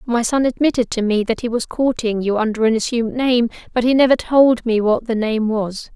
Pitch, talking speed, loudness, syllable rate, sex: 235 Hz, 230 wpm, -17 LUFS, 5.4 syllables/s, female